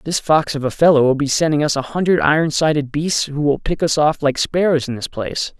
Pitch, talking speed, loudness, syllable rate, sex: 150 Hz, 255 wpm, -17 LUFS, 5.7 syllables/s, male